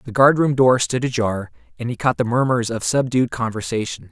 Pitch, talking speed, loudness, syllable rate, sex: 120 Hz, 190 wpm, -19 LUFS, 5.3 syllables/s, male